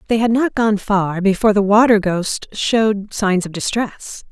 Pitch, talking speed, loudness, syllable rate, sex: 205 Hz, 180 wpm, -17 LUFS, 4.4 syllables/s, female